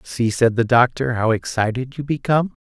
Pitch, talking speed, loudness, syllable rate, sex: 125 Hz, 205 wpm, -19 LUFS, 6.4 syllables/s, male